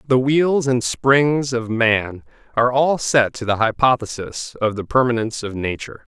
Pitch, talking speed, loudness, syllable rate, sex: 120 Hz, 165 wpm, -19 LUFS, 4.7 syllables/s, male